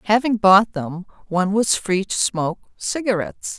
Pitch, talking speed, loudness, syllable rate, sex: 200 Hz, 150 wpm, -19 LUFS, 5.0 syllables/s, female